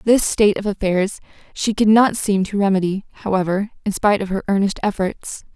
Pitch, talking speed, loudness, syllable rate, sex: 200 Hz, 185 wpm, -19 LUFS, 5.6 syllables/s, female